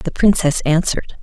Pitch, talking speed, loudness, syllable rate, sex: 170 Hz, 145 wpm, -16 LUFS, 5.1 syllables/s, female